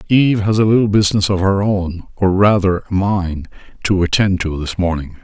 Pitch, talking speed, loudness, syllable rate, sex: 95 Hz, 160 wpm, -16 LUFS, 5.1 syllables/s, male